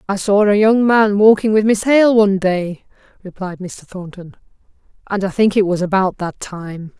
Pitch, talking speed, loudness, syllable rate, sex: 195 Hz, 190 wpm, -15 LUFS, 4.7 syllables/s, female